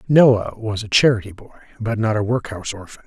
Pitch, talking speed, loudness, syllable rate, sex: 110 Hz, 195 wpm, -19 LUFS, 6.0 syllables/s, male